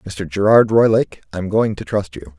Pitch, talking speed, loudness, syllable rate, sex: 100 Hz, 200 wpm, -16 LUFS, 4.9 syllables/s, male